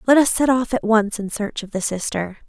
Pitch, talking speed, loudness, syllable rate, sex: 225 Hz, 265 wpm, -20 LUFS, 5.4 syllables/s, female